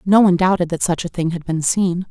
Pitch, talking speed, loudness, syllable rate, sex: 175 Hz, 285 wpm, -18 LUFS, 6.0 syllables/s, female